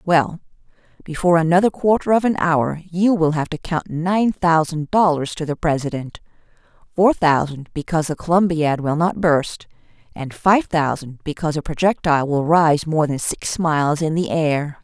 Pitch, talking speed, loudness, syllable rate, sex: 160 Hz, 165 wpm, -19 LUFS, 4.9 syllables/s, female